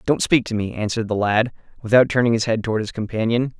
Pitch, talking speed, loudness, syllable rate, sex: 115 Hz, 235 wpm, -20 LUFS, 6.7 syllables/s, male